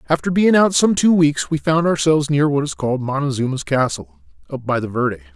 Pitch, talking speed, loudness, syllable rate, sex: 150 Hz, 215 wpm, -17 LUFS, 6.0 syllables/s, male